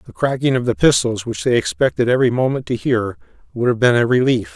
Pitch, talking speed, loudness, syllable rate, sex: 125 Hz, 225 wpm, -17 LUFS, 6.2 syllables/s, male